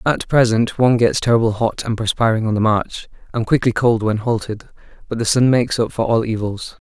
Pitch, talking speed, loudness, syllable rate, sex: 115 Hz, 210 wpm, -17 LUFS, 5.6 syllables/s, male